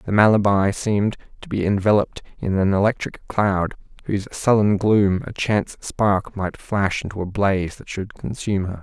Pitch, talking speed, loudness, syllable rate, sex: 100 Hz, 170 wpm, -21 LUFS, 5.1 syllables/s, male